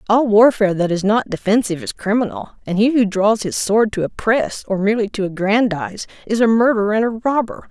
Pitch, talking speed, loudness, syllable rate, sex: 215 Hz, 200 wpm, -17 LUFS, 5.9 syllables/s, female